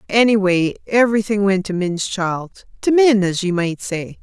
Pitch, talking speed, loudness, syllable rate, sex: 200 Hz, 155 wpm, -17 LUFS, 4.5 syllables/s, female